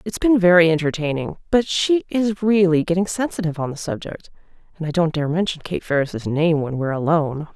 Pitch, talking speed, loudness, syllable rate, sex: 170 Hz, 190 wpm, -20 LUFS, 5.8 syllables/s, female